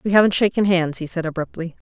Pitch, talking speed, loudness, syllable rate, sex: 175 Hz, 220 wpm, -20 LUFS, 6.5 syllables/s, female